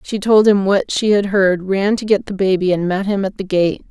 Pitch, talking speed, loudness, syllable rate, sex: 195 Hz, 275 wpm, -16 LUFS, 5.0 syllables/s, female